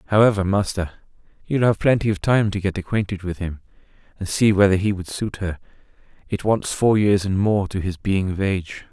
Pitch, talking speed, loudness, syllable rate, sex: 100 Hz, 200 wpm, -21 LUFS, 5.4 syllables/s, male